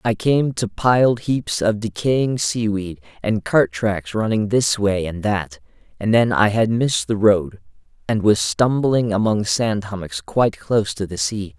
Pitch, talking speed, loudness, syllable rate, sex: 105 Hz, 175 wpm, -19 LUFS, 4.2 syllables/s, male